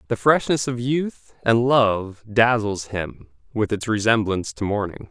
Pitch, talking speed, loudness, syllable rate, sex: 110 Hz, 155 wpm, -21 LUFS, 4.2 syllables/s, male